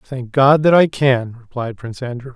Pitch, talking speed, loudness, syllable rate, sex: 130 Hz, 205 wpm, -16 LUFS, 5.0 syllables/s, male